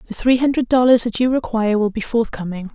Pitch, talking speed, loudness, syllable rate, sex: 230 Hz, 220 wpm, -18 LUFS, 6.3 syllables/s, female